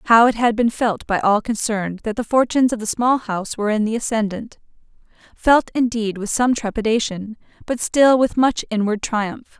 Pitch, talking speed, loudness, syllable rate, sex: 225 Hz, 180 wpm, -19 LUFS, 5.3 syllables/s, female